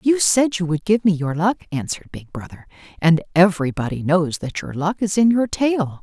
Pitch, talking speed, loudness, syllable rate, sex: 180 Hz, 210 wpm, -19 LUFS, 5.1 syllables/s, female